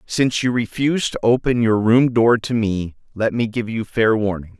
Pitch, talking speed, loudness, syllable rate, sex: 115 Hz, 210 wpm, -18 LUFS, 5.0 syllables/s, male